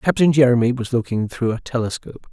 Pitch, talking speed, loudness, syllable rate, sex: 125 Hz, 180 wpm, -19 LUFS, 6.4 syllables/s, male